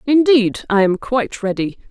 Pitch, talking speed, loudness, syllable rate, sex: 230 Hz, 155 wpm, -16 LUFS, 4.9 syllables/s, female